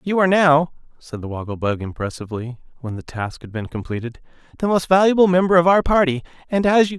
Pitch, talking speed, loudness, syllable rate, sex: 150 Hz, 205 wpm, -19 LUFS, 6.1 syllables/s, male